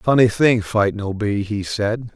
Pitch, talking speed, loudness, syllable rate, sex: 110 Hz, 165 wpm, -19 LUFS, 3.8 syllables/s, male